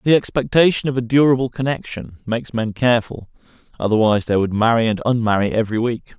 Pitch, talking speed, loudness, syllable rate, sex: 120 Hz, 165 wpm, -18 LUFS, 6.4 syllables/s, male